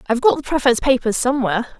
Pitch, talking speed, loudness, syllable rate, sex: 250 Hz, 200 wpm, -18 LUFS, 8.0 syllables/s, female